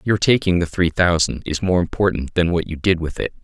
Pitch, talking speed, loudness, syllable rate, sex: 85 Hz, 245 wpm, -19 LUFS, 5.6 syllables/s, male